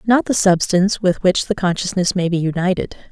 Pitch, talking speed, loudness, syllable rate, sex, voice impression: 185 Hz, 195 wpm, -17 LUFS, 5.6 syllables/s, female, very feminine, adult-like, slightly middle-aged, thin, tensed, slightly powerful, bright, hard, very clear, fluent, cool, very intellectual, very refreshing, very sincere, very calm, friendly, very reassuring, slightly unique, elegant, sweet, slightly lively, kind, slightly sharp